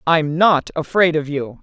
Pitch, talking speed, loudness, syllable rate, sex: 160 Hz, 185 wpm, -17 LUFS, 4.1 syllables/s, female